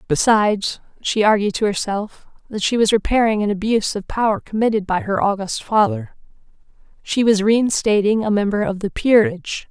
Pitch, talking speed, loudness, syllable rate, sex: 215 Hz, 160 wpm, -18 LUFS, 5.3 syllables/s, female